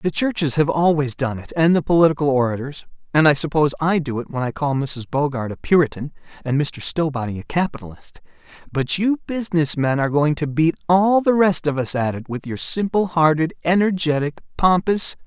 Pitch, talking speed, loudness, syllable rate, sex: 155 Hz, 190 wpm, -19 LUFS, 5.5 syllables/s, male